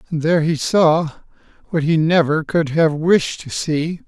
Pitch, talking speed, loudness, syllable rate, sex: 160 Hz, 160 wpm, -17 LUFS, 3.9 syllables/s, male